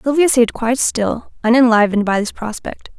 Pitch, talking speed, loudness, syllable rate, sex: 235 Hz, 160 wpm, -15 LUFS, 5.4 syllables/s, female